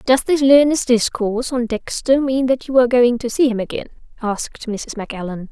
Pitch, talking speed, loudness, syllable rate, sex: 245 Hz, 195 wpm, -17 LUFS, 5.7 syllables/s, female